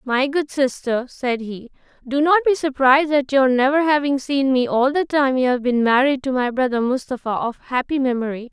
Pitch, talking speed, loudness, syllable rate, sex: 265 Hz, 205 wpm, -19 LUFS, 5.2 syllables/s, female